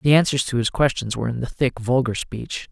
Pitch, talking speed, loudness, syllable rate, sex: 125 Hz, 245 wpm, -22 LUFS, 5.7 syllables/s, male